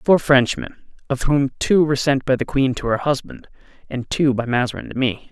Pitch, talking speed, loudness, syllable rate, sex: 135 Hz, 225 wpm, -19 LUFS, 5.5 syllables/s, male